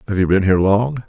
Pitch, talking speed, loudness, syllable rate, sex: 105 Hz, 280 wpm, -16 LUFS, 7.1 syllables/s, male